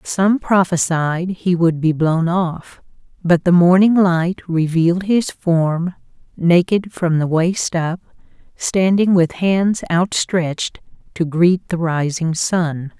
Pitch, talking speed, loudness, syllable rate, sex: 175 Hz, 130 wpm, -17 LUFS, 3.4 syllables/s, female